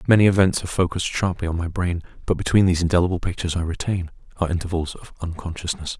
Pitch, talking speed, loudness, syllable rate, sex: 90 Hz, 190 wpm, -22 LUFS, 7.4 syllables/s, male